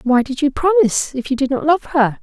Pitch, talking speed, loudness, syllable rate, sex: 280 Hz, 270 wpm, -17 LUFS, 5.7 syllables/s, female